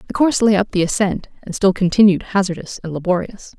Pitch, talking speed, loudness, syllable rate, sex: 190 Hz, 200 wpm, -17 LUFS, 6.2 syllables/s, female